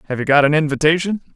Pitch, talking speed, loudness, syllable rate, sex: 155 Hz, 220 wpm, -16 LUFS, 7.7 syllables/s, male